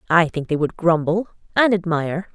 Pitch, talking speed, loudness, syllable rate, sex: 175 Hz, 180 wpm, -20 LUFS, 5.4 syllables/s, female